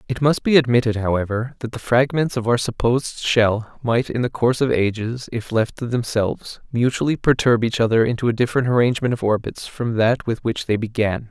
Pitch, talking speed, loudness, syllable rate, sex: 120 Hz, 200 wpm, -20 LUFS, 5.6 syllables/s, male